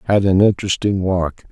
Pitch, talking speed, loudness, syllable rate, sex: 95 Hz, 160 wpm, -17 LUFS, 5.4 syllables/s, male